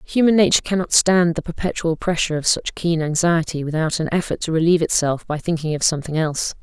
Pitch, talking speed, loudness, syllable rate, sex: 165 Hz, 200 wpm, -19 LUFS, 6.4 syllables/s, female